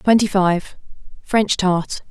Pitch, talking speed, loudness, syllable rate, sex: 195 Hz, 85 wpm, -18 LUFS, 3.4 syllables/s, female